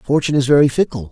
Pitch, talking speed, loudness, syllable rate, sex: 140 Hz, 215 wpm, -15 LUFS, 7.5 syllables/s, male